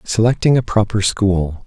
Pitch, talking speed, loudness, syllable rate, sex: 105 Hz, 145 wpm, -16 LUFS, 4.5 syllables/s, male